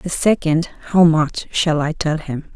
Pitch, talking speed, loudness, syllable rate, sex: 160 Hz, 190 wpm, -17 LUFS, 3.7 syllables/s, female